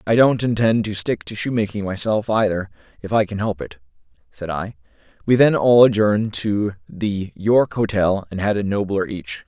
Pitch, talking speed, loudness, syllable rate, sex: 100 Hz, 185 wpm, -19 LUFS, 4.8 syllables/s, male